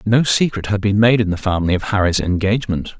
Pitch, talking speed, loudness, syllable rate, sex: 100 Hz, 220 wpm, -17 LUFS, 6.3 syllables/s, male